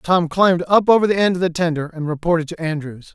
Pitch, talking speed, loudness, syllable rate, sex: 170 Hz, 250 wpm, -18 LUFS, 6.2 syllables/s, male